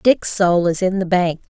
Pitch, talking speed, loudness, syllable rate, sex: 185 Hz, 225 wpm, -17 LUFS, 4.2 syllables/s, female